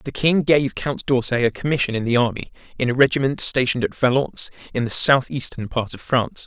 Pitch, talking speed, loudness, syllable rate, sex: 130 Hz, 205 wpm, -20 LUFS, 6.0 syllables/s, male